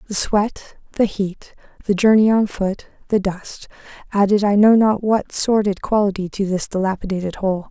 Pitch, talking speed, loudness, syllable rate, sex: 200 Hz, 165 wpm, -18 LUFS, 4.9 syllables/s, female